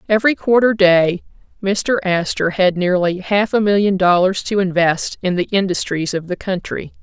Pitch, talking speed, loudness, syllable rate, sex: 190 Hz, 160 wpm, -16 LUFS, 5.6 syllables/s, female